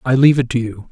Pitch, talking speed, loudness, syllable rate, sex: 125 Hz, 330 wpm, -15 LUFS, 7.4 syllables/s, male